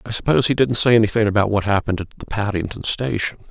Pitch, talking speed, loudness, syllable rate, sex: 110 Hz, 220 wpm, -19 LUFS, 7.0 syllables/s, male